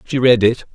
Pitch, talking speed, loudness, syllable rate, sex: 120 Hz, 245 wpm, -14 LUFS, 5.0 syllables/s, male